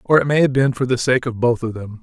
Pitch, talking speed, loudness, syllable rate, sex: 125 Hz, 355 wpm, -18 LUFS, 6.2 syllables/s, male